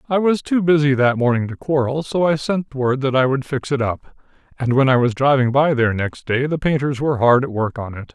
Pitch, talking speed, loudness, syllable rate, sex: 135 Hz, 260 wpm, -18 LUFS, 5.6 syllables/s, male